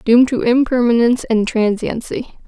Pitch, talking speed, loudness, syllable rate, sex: 240 Hz, 120 wpm, -16 LUFS, 5.3 syllables/s, female